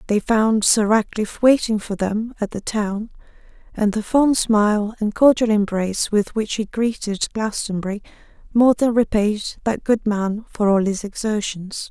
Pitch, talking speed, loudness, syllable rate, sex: 215 Hz, 160 wpm, -20 LUFS, 4.5 syllables/s, female